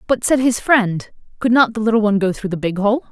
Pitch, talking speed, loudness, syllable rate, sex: 220 Hz, 270 wpm, -17 LUFS, 6.0 syllables/s, female